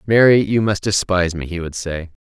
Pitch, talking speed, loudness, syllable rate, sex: 95 Hz, 215 wpm, -17 LUFS, 5.6 syllables/s, male